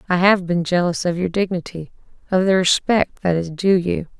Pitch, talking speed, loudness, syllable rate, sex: 180 Hz, 185 wpm, -19 LUFS, 5.1 syllables/s, female